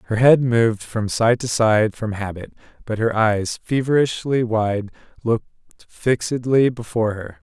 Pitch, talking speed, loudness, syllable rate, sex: 115 Hz, 145 wpm, -20 LUFS, 4.6 syllables/s, male